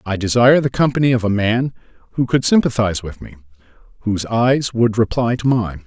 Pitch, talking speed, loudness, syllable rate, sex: 115 Hz, 185 wpm, -17 LUFS, 5.8 syllables/s, male